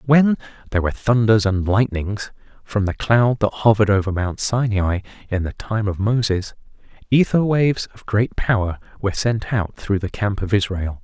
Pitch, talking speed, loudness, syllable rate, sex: 105 Hz, 175 wpm, -20 LUFS, 5.0 syllables/s, male